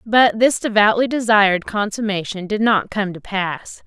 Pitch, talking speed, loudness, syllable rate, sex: 210 Hz, 155 wpm, -18 LUFS, 4.6 syllables/s, female